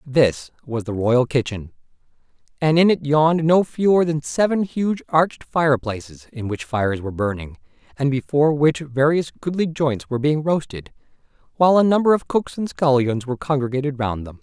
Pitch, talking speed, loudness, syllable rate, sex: 140 Hz, 170 wpm, -20 LUFS, 5.4 syllables/s, male